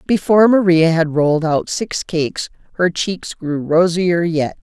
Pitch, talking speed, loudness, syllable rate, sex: 170 Hz, 155 wpm, -16 LUFS, 4.3 syllables/s, female